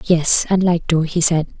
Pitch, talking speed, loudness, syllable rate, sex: 165 Hz, 225 wpm, -15 LUFS, 4.4 syllables/s, female